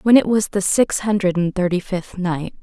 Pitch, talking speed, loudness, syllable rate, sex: 190 Hz, 230 wpm, -19 LUFS, 4.8 syllables/s, female